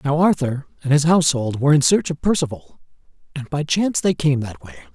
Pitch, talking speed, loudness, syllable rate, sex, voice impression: 150 Hz, 205 wpm, -19 LUFS, 6.1 syllables/s, male, masculine, adult-like, slightly middle-aged, slightly thick, slightly relaxed, slightly weak, slightly bright, slightly soft, slightly muffled, slightly fluent, slightly cool, intellectual, slightly refreshing, sincere, very calm, slightly mature, friendly, reassuring, slightly unique, elegant, sweet, very kind, very modest, slightly light